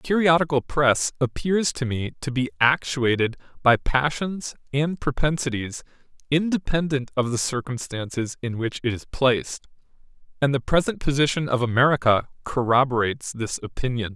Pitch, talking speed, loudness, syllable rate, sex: 135 Hz, 130 wpm, -23 LUFS, 5.1 syllables/s, male